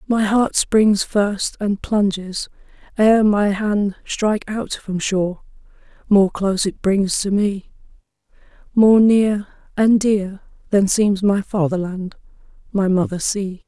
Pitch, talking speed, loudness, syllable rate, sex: 200 Hz, 130 wpm, -18 LUFS, 3.7 syllables/s, female